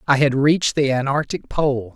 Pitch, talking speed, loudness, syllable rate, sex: 140 Hz, 185 wpm, -19 LUFS, 5.0 syllables/s, male